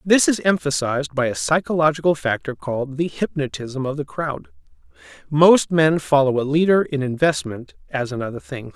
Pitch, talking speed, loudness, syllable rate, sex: 140 Hz, 165 wpm, -20 LUFS, 5.2 syllables/s, male